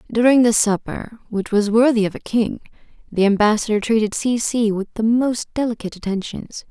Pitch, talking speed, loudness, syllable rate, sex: 220 Hz, 170 wpm, -19 LUFS, 5.4 syllables/s, female